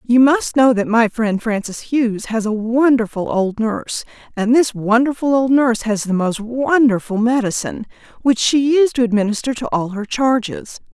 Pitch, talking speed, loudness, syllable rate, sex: 235 Hz, 175 wpm, -17 LUFS, 4.9 syllables/s, female